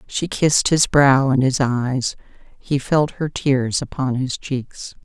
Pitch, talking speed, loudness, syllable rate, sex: 135 Hz, 165 wpm, -19 LUFS, 3.6 syllables/s, female